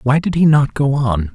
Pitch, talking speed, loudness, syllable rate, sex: 135 Hz, 265 wpm, -15 LUFS, 4.6 syllables/s, male